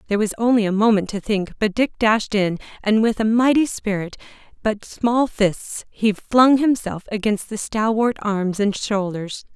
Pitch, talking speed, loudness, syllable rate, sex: 215 Hz, 175 wpm, -20 LUFS, 4.5 syllables/s, female